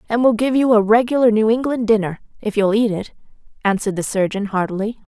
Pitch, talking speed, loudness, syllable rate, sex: 220 Hz, 200 wpm, -18 LUFS, 6.3 syllables/s, female